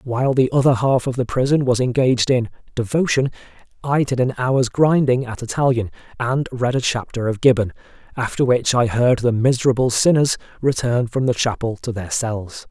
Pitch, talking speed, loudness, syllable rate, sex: 125 Hz, 180 wpm, -19 LUFS, 5.3 syllables/s, male